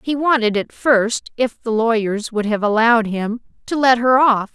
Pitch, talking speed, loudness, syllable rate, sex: 230 Hz, 200 wpm, -17 LUFS, 4.6 syllables/s, female